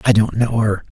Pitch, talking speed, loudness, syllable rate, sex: 105 Hz, 245 wpm, -17 LUFS, 5.1 syllables/s, male